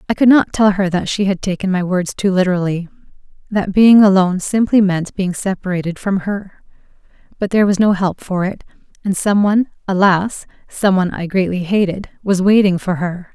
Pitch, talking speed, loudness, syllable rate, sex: 190 Hz, 190 wpm, -16 LUFS, 5.4 syllables/s, female